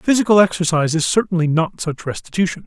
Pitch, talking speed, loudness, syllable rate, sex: 175 Hz, 160 wpm, -17 LUFS, 6.5 syllables/s, male